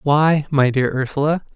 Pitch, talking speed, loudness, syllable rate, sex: 145 Hz, 155 wpm, -18 LUFS, 4.5 syllables/s, male